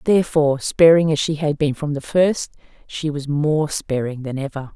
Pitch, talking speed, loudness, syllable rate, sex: 150 Hz, 190 wpm, -19 LUFS, 4.9 syllables/s, female